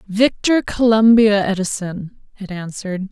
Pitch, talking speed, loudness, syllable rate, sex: 205 Hz, 95 wpm, -16 LUFS, 4.3 syllables/s, female